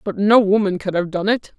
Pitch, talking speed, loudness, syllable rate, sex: 200 Hz, 265 wpm, -17 LUFS, 5.4 syllables/s, female